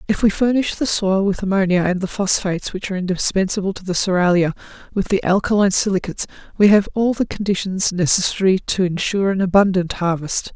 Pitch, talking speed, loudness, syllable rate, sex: 190 Hz, 175 wpm, -18 LUFS, 6.1 syllables/s, female